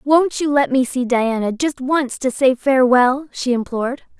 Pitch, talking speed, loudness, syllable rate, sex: 260 Hz, 185 wpm, -17 LUFS, 4.5 syllables/s, female